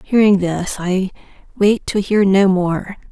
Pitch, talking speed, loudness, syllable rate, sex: 195 Hz, 155 wpm, -16 LUFS, 3.8 syllables/s, female